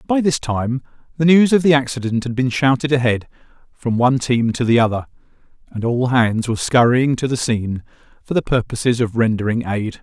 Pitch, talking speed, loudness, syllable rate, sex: 125 Hz, 190 wpm, -18 LUFS, 5.7 syllables/s, male